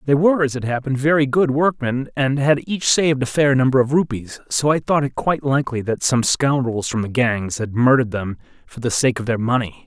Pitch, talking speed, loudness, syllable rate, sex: 130 Hz, 230 wpm, -19 LUFS, 5.7 syllables/s, male